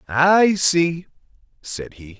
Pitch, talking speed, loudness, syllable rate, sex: 155 Hz, 110 wpm, -18 LUFS, 2.7 syllables/s, male